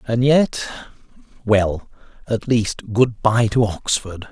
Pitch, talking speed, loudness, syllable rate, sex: 110 Hz, 110 wpm, -19 LUFS, 3.3 syllables/s, male